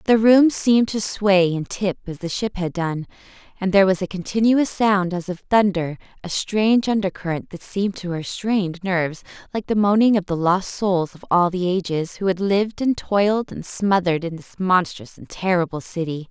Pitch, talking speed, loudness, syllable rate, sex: 190 Hz, 200 wpm, -20 LUFS, 5.1 syllables/s, female